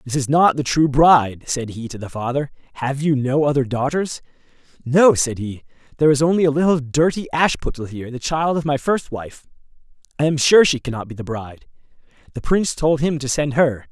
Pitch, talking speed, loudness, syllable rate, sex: 140 Hz, 205 wpm, -19 LUFS, 5.6 syllables/s, male